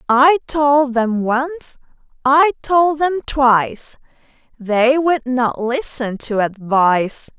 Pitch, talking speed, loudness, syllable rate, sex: 265 Hz, 115 wpm, -16 LUFS, 3.1 syllables/s, female